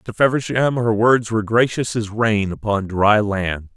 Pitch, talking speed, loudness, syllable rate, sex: 110 Hz, 175 wpm, -18 LUFS, 4.4 syllables/s, male